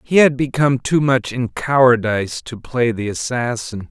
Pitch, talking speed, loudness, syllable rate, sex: 125 Hz, 155 wpm, -17 LUFS, 4.8 syllables/s, male